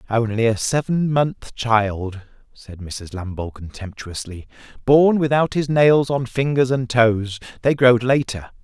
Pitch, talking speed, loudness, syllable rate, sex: 120 Hz, 140 wpm, -19 LUFS, 4.2 syllables/s, male